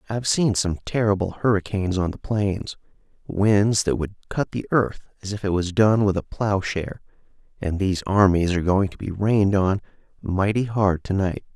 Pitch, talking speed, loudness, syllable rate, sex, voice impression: 100 Hz, 180 wpm, -22 LUFS, 5.1 syllables/s, male, very masculine, middle-aged, thick, slightly relaxed, powerful, dark, soft, muffled, fluent, slightly raspy, cool, very intellectual, slightly refreshing, sincere, very calm, mature, very friendly, very reassuring, very unique, slightly elegant, wild, sweet, slightly lively, kind, very modest